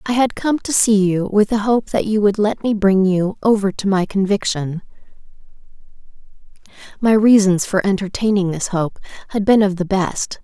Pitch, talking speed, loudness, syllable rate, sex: 200 Hz, 180 wpm, -17 LUFS, 4.9 syllables/s, female